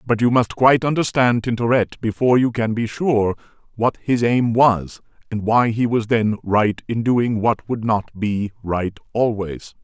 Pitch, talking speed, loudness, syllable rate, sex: 115 Hz, 175 wpm, -19 LUFS, 4.3 syllables/s, male